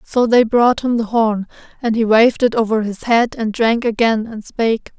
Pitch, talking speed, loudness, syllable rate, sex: 225 Hz, 215 wpm, -16 LUFS, 4.9 syllables/s, female